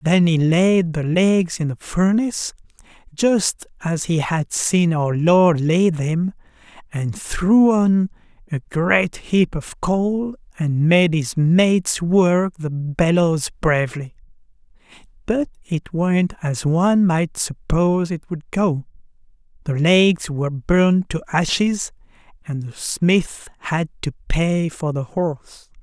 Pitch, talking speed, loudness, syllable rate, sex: 170 Hz, 135 wpm, -19 LUFS, 3.5 syllables/s, male